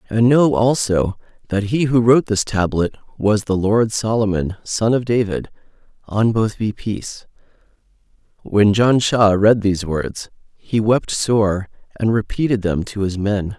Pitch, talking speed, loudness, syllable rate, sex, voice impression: 105 Hz, 150 wpm, -18 LUFS, 5.3 syllables/s, male, masculine, adult-like, slightly thick, cool, sincere, friendly, slightly kind